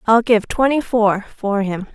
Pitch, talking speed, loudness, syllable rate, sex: 220 Hz, 185 wpm, -17 LUFS, 4.2 syllables/s, female